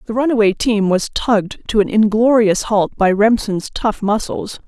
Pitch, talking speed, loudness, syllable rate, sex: 215 Hz, 165 wpm, -16 LUFS, 4.7 syllables/s, female